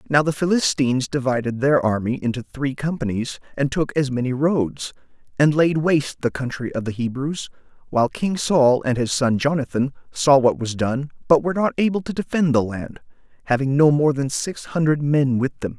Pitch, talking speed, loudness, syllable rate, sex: 140 Hz, 190 wpm, -21 LUFS, 5.2 syllables/s, male